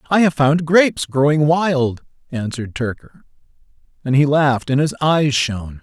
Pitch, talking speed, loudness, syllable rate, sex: 145 Hz, 155 wpm, -17 LUFS, 5.3 syllables/s, male